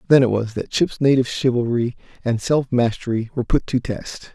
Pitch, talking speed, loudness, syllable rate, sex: 125 Hz, 195 wpm, -20 LUFS, 5.5 syllables/s, male